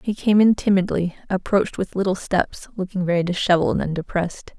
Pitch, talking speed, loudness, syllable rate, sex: 185 Hz, 170 wpm, -21 LUFS, 5.9 syllables/s, female